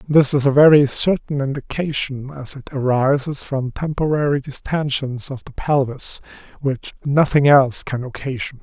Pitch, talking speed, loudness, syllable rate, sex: 135 Hz, 140 wpm, -19 LUFS, 4.6 syllables/s, male